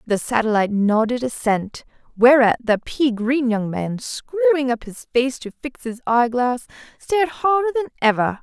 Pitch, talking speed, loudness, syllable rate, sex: 250 Hz, 165 wpm, -20 LUFS, 4.6 syllables/s, female